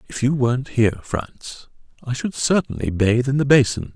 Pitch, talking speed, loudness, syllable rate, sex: 125 Hz, 180 wpm, -20 LUFS, 5.0 syllables/s, male